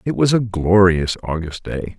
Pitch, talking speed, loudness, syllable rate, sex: 95 Hz, 180 wpm, -18 LUFS, 4.4 syllables/s, male